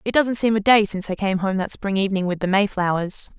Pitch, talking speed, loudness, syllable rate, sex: 200 Hz, 265 wpm, -20 LUFS, 6.2 syllables/s, female